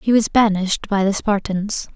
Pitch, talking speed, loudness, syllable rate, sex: 205 Hz, 185 wpm, -18 LUFS, 5.0 syllables/s, female